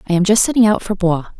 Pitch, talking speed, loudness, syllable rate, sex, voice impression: 200 Hz, 300 wpm, -15 LUFS, 7.6 syllables/s, female, feminine, middle-aged, tensed, slightly hard, clear, intellectual, calm, reassuring, elegant, lively, slightly strict